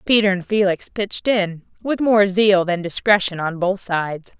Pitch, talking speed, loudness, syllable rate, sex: 195 Hz, 180 wpm, -19 LUFS, 4.7 syllables/s, female